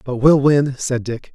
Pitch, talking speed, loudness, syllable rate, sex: 130 Hz, 225 wpm, -16 LUFS, 4.2 syllables/s, male